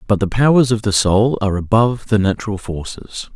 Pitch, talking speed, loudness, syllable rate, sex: 105 Hz, 195 wpm, -16 LUFS, 5.7 syllables/s, male